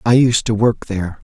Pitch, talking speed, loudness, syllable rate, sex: 110 Hz, 230 wpm, -17 LUFS, 5.3 syllables/s, male